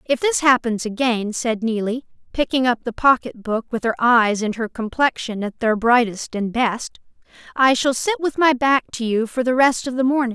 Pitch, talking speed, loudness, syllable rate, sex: 245 Hz, 210 wpm, -19 LUFS, 4.8 syllables/s, female